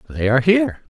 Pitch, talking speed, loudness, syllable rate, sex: 125 Hz, 190 wpm, -17 LUFS, 7.1 syllables/s, male